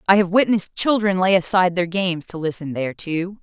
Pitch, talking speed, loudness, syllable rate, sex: 185 Hz, 195 wpm, -20 LUFS, 6.1 syllables/s, female